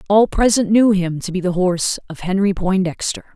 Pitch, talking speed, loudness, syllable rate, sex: 190 Hz, 195 wpm, -17 LUFS, 5.4 syllables/s, female